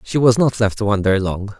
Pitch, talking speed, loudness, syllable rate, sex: 105 Hz, 265 wpm, -17 LUFS, 5.4 syllables/s, male